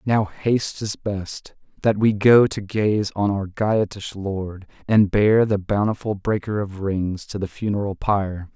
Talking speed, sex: 170 wpm, male